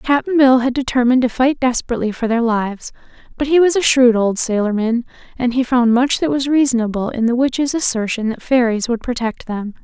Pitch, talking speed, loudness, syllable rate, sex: 245 Hz, 200 wpm, -16 LUFS, 5.6 syllables/s, female